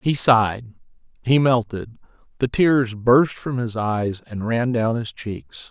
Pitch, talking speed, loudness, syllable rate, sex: 115 Hz, 160 wpm, -20 LUFS, 3.6 syllables/s, male